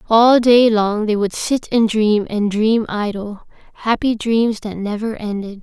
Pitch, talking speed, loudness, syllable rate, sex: 215 Hz, 170 wpm, -17 LUFS, 3.9 syllables/s, female